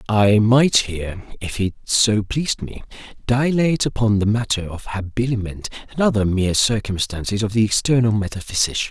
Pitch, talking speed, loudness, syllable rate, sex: 110 Hz, 135 wpm, -19 LUFS, 5.3 syllables/s, male